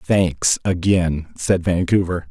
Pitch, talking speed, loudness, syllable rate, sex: 90 Hz, 105 wpm, -19 LUFS, 3.4 syllables/s, male